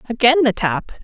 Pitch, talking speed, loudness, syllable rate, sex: 215 Hz, 175 wpm, -16 LUFS, 6.0 syllables/s, female